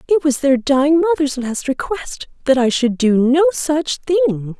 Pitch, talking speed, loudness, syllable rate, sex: 270 Hz, 185 wpm, -16 LUFS, 4.6 syllables/s, female